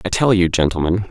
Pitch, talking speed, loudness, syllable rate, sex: 95 Hz, 215 wpm, -17 LUFS, 5.9 syllables/s, male